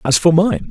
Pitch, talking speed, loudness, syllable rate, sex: 175 Hz, 255 wpm, -14 LUFS, 6.6 syllables/s, male